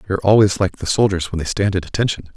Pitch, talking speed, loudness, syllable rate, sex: 95 Hz, 255 wpm, -18 LUFS, 7.0 syllables/s, male